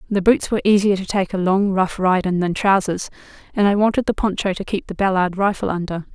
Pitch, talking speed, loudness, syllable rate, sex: 195 Hz, 235 wpm, -19 LUFS, 5.9 syllables/s, female